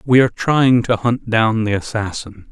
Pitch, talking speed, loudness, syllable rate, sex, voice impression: 110 Hz, 190 wpm, -16 LUFS, 4.6 syllables/s, male, masculine, very adult-like, slightly thick, cool, intellectual, slightly sweet